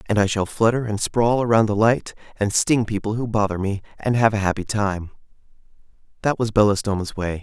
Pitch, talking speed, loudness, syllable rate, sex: 105 Hz, 195 wpm, -21 LUFS, 5.6 syllables/s, male